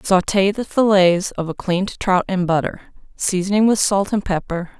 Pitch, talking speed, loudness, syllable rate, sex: 190 Hz, 175 wpm, -18 LUFS, 4.9 syllables/s, female